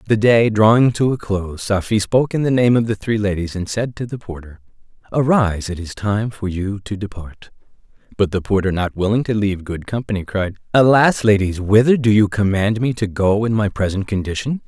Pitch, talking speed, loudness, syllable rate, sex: 105 Hz, 210 wpm, -18 LUFS, 5.5 syllables/s, male